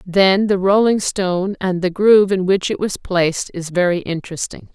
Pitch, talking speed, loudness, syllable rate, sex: 190 Hz, 190 wpm, -17 LUFS, 5.1 syllables/s, female